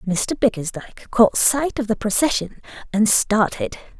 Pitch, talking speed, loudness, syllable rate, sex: 225 Hz, 135 wpm, -19 LUFS, 4.6 syllables/s, female